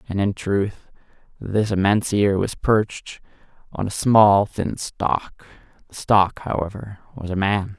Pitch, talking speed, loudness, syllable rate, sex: 100 Hz, 140 wpm, -20 LUFS, 4.0 syllables/s, male